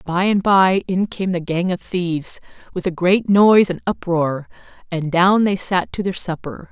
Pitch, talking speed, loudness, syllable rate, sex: 180 Hz, 195 wpm, -18 LUFS, 4.5 syllables/s, female